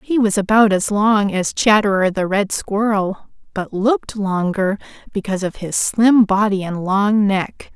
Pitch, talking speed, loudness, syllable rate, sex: 205 Hz, 165 wpm, -17 LUFS, 4.2 syllables/s, female